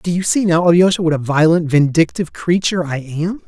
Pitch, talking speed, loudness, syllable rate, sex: 170 Hz, 205 wpm, -15 LUFS, 5.9 syllables/s, male